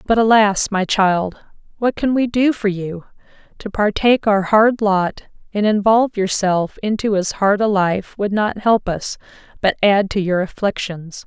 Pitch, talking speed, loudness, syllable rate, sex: 205 Hz, 165 wpm, -17 LUFS, 4.4 syllables/s, female